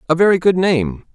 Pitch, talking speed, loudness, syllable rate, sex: 160 Hz, 210 wpm, -15 LUFS, 5.7 syllables/s, male